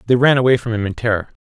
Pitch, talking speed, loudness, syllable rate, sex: 115 Hz, 295 wpm, -16 LUFS, 8.0 syllables/s, male